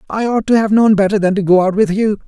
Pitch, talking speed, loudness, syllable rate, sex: 205 Hz, 315 wpm, -13 LUFS, 6.4 syllables/s, male